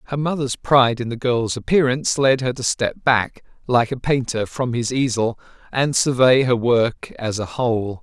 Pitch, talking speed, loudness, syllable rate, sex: 125 Hz, 185 wpm, -19 LUFS, 4.7 syllables/s, male